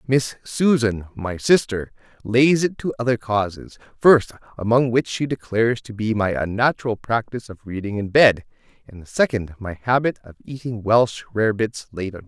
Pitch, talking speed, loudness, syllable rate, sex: 115 Hz, 170 wpm, -20 LUFS, 5.1 syllables/s, male